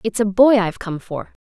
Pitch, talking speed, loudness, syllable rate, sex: 205 Hz, 250 wpm, -17 LUFS, 5.6 syllables/s, female